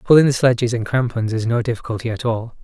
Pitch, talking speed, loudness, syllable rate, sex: 120 Hz, 230 wpm, -19 LUFS, 6.5 syllables/s, male